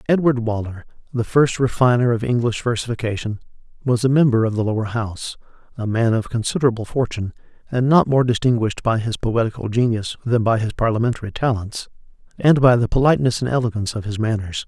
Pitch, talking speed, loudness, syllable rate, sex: 115 Hz, 170 wpm, -19 LUFS, 6.3 syllables/s, male